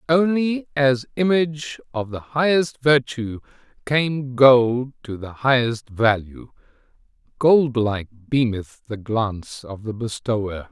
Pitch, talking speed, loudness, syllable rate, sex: 125 Hz, 110 wpm, -20 LUFS, 3.9 syllables/s, male